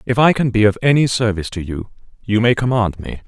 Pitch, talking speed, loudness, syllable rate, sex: 110 Hz, 240 wpm, -16 LUFS, 6.3 syllables/s, male